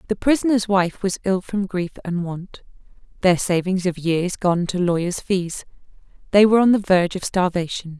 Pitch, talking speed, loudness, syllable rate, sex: 185 Hz, 180 wpm, -20 LUFS, 5.0 syllables/s, female